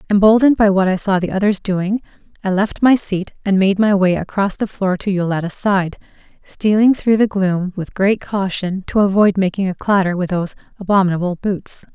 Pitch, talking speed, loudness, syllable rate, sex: 195 Hz, 190 wpm, -16 LUFS, 5.3 syllables/s, female